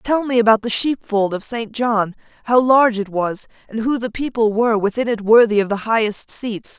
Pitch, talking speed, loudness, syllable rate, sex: 225 Hz, 210 wpm, -18 LUFS, 5.2 syllables/s, female